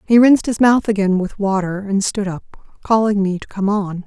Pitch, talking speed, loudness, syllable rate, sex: 205 Hz, 220 wpm, -17 LUFS, 4.9 syllables/s, female